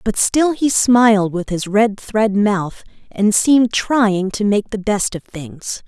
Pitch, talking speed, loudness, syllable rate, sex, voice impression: 210 Hz, 185 wpm, -16 LUFS, 3.6 syllables/s, female, very feminine, adult-like, slightly middle-aged, thin, tensed, slightly powerful, bright, very hard, very clear, fluent, slightly cool, intellectual, very refreshing, sincere, slightly calm, slightly friendly, reassuring, very unique, slightly elegant, wild, sweet, lively, strict, intense, slightly sharp